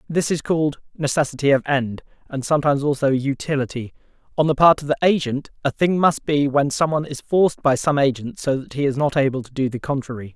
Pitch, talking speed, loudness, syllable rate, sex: 140 Hz, 215 wpm, -20 LUFS, 6.1 syllables/s, male